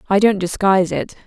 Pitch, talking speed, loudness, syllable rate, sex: 195 Hz, 190 wpm, -17 LUFS, 6.1 syllables/s, female